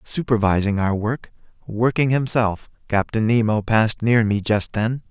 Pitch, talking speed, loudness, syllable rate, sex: 110 Hz, 140 wpm, -20 LUFS, 4.5 syllables/s, male